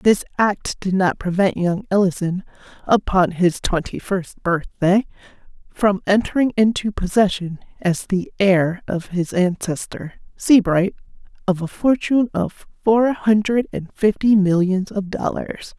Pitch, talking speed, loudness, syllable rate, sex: 195 Hz, 135 wpm, -19 LUFS, 4.2 syllables/s, female